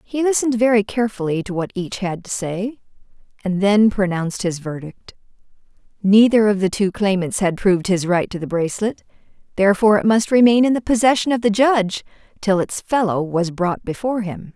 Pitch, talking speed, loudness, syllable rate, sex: 205 Hz, 180 wpm, -18 LUFS, 5.6 syllables/s, female